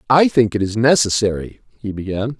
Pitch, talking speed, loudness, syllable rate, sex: 115 Hz, 175 wpm, -17 LUFS, 5.1 syllables/s, male